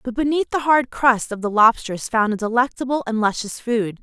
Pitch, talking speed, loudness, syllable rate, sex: 235 Hz, 225 wpm, -19 LUFS, 5.4 syllables/s, female